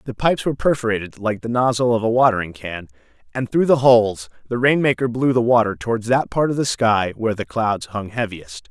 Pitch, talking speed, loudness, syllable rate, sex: 115 Hz, 220 wpm, -19 LUFS, 5.8 syllables/s, male